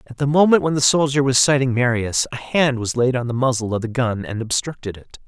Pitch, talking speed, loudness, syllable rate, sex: 125 Hz, 250 wpm, -18 LUFS, 5.9 syllables/s, male